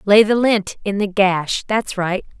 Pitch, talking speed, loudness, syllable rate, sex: 200 Hz, 200 wpm, -18 LUFS, 3.9 syllables/s, female